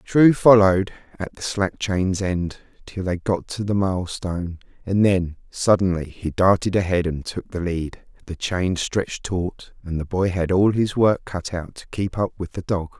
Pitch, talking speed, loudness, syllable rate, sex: 95 Hz, 195 wpm, -22 LUFS, 4.5 syllables/s, male